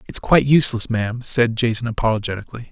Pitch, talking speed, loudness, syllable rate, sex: 115 Hz, 155 wpm, -18 LUFS, 7.1 syllables/s, male